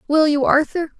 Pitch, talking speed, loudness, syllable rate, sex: 305 Hz, 180 wpm, -17 LUFS, 4.9 syllables/s, female